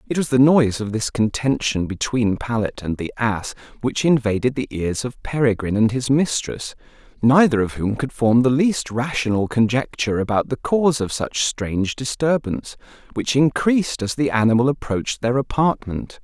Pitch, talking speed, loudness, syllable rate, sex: 125 Hz, 165 wpm, -20 LUFS, 5.1 syllables/s, male